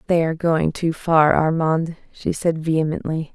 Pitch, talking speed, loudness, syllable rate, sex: 160 Hz, 160 wpm, -20 LUFS, 4.7 syllables/s, female